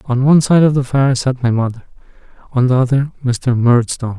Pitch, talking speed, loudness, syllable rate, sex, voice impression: 130 Hz, 200 wpm, -14 LUFS, 5.8 syllables/s, male, masculine, adult-like, slightly relaxed, weak, soft, fluent, slightly raspy, intellectual, calm, friendly, reassuring, kind, modest